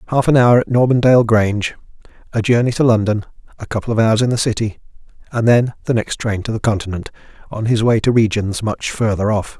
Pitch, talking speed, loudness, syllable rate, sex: 115 Hz, 190 wpm, -16 LUFS, 6.1 syllables/s, male